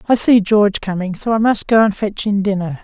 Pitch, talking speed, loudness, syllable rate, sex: 205 Hz, 255 wpm, -15 LUFS, 5.7 syllables/s, female